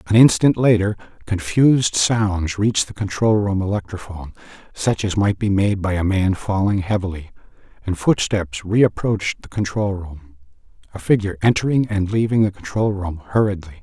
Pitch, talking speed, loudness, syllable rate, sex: 100 Hz, 150 wpm, -19 LUFS, 5.1 syllables/s, male